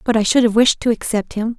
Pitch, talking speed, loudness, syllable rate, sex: 225 Hz, 305 wpm, -16 LUFS, 6.0 syllables/s, female